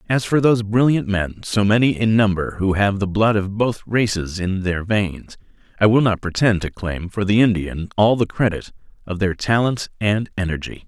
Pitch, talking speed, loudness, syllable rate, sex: 100 Hz, 200 wpm, -19 LUFS, 4.9 syllables/s, male